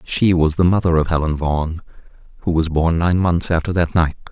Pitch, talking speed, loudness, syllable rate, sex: 85 Hz, 210 wpm, -18 LUFS, 5.5 syllables/s, male